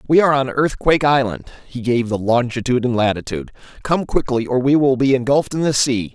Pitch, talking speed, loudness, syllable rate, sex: 130 Hz, 215 wpm, -17 LUFS, 6.4 syllables/s, male